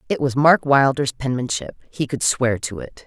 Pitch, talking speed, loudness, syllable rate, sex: 135 Hz, 175 wpm, -19 LUFS, 4.8 syllables/s, female